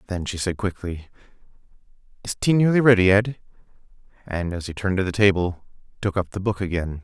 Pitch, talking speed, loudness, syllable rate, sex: 95 Hz, 180 wpm, -22 LUFS, 6.0 syllables/s, male